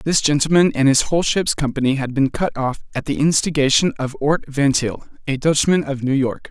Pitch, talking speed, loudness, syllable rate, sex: 145 Hz, 205 wpm, -18 LUFS, 5.5 syllables/s, male